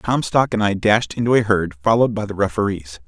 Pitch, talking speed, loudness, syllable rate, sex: 105 Hz, 215 wpm, -18 LUFS, 5.7 syllables/s, male